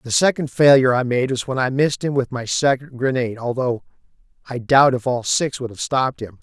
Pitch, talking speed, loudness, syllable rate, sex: 130 Hz, 225 wpm, -19 LUFS, 5.9 syllables/s, male